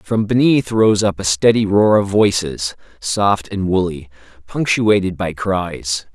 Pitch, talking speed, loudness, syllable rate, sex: 95 Hz, 145 wpm, -16 LUFS, 3.9 syllables/s, male